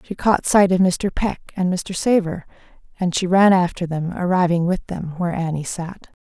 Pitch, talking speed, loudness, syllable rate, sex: 180 Hz, 195 wpm, -20 LUFS, 4.9 syllables/s, female